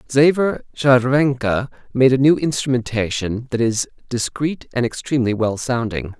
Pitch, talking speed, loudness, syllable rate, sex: 125 Hz, 125 wpm, -19 LUFS, 4.7 syllables/s, male